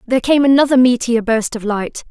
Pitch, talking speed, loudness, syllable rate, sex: 245 Hz, 200 wpm, -14 LUFS, 5.7 syllables/s, female